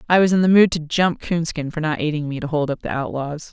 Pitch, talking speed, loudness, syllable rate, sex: 160 Hz, 290 wpm, -20 LUFS, 6.0 syllables/s, female